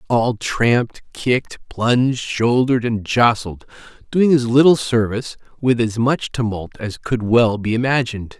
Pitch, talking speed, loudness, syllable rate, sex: 120 Hz, 145 wpm, -18 LUFS, 4.4 syllables/s, male